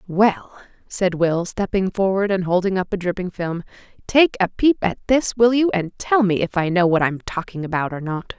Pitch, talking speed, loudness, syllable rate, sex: 190 Hz, 215 wpm, -20 LUFS, 4.9 syllables/s, female